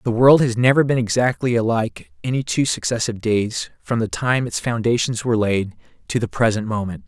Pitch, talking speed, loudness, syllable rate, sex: 115 Hz, 185 wpm, -19 LUFS, 5.6 syllables/s, male